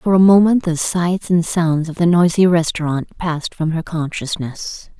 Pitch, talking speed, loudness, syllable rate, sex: 170 Hz, 180 wpm, -17 LUFS, 4.5 syllables/s, female